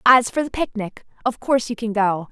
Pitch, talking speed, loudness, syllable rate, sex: 230 Hz, 235 wpm, -21 LUFS, 5.5 syllables/s, female